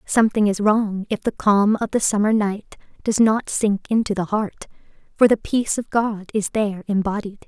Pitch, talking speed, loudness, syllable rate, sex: 210 Hz, 195 wpm, -20 LUFS, 5.1 syllables/s, female